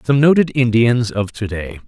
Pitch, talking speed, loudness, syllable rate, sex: 120 Hz, 190 wpm, -16 LUFS, 4.6 syllables/s, male